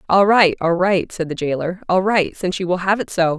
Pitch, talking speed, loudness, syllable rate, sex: 180 Hz, 265 wpm, -18 LUFS, 5.5 syllables/s, female